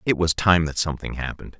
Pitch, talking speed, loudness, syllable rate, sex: 85 Hz, 225 wpm, -22 LUFS, 6.8 syllables/s, male